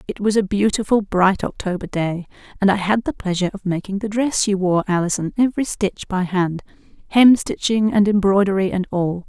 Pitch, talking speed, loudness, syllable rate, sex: 195 Hz, 180 wpm, -19 LUFS, 5.4 syllables/s, female